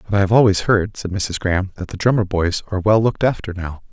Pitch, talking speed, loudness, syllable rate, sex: 100 Hz, 260 wpm, -18 LUFS, 6.5 syllables/s, male